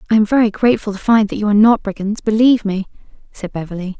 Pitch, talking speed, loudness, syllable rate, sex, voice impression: 210 Hz, 225 wpm, -15 LUFS, 7.2 syllables/s, female, feminine, adult-like, slightly relaxed, soft, fluent, slightly raspy, slightly calm, friendly, reassuring, elegant, kind, modest